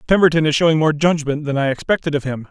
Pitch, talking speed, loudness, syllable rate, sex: 155 Hz, 240 wpm, -17 LUFS, 6.8 syllables/s, male